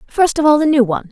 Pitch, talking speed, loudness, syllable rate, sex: 265 Hz, 325 wpm, -13 LUFS, 7.4 syllables/s, female